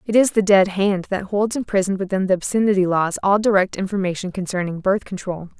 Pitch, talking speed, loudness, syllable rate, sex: 195 Hz, 195 wpm, -20 LUFS, 6.0 syllables/s, female